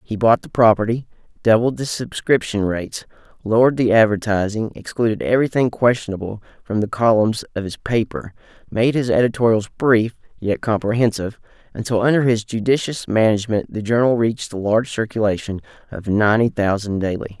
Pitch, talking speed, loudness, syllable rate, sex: 110 Hz, 140 wpm, -19 LUFS, 5.7 syllables/s, male